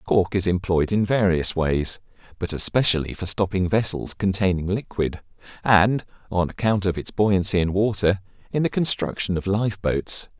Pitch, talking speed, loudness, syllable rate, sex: 95 Hz, 155 wpm, -22 LUFS, 4.8 syllables/s, male